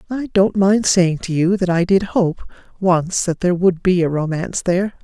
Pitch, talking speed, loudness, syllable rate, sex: 185 Hz, 215 wpm, -17 LUFS, 5.0 syllables/s, female